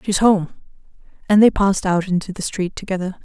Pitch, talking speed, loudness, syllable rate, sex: 190 Hz, 185 wpm, -18 LUFS, 6.0 syllables/s, female